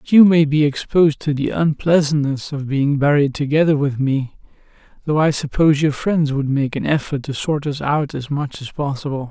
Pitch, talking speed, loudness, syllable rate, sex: 145 Hz, 200 wpm, -18 LUFS, 5.2 syllables/s, male